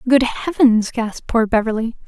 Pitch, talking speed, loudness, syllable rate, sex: 235 Hz, 145 wpm, -17 LUFS, 4.9 syllables/s, female